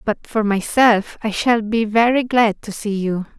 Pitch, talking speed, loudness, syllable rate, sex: 220 Hz, 195 wpm, -18 LUFS, 4.1 syllables/s, female